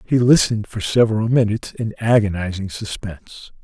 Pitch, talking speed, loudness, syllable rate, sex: 105 Hz, 130 wpm, -19 LUFS, 5.6 syllables/s, male